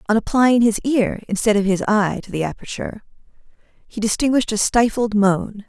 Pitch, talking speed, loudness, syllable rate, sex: 215 Hz, 170 wpm, -19 LUFS, 5.3 syllables/s, female